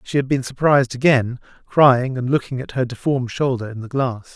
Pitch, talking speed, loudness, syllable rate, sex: 130 Hz, 205 wpm, -19 LUFS, 5.5 syllables/s, male